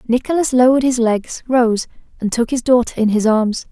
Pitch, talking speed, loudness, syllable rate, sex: 240 Hz, 195 wpm, -16 LUFS, 5.3 syllables/s, female